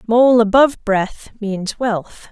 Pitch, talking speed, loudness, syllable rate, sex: 220 Hz, 130 wpm, -16 LUFS, 3.4 syllables/s, female